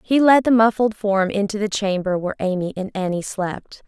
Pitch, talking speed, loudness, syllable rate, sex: 205 Hz, 200 wpm, -20 LUFS, 5.2 syllables/s, female